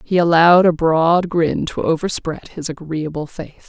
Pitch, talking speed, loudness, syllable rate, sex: 165 Hz, 165 wpm, -17 LUFS, 4.5 syllables/s, female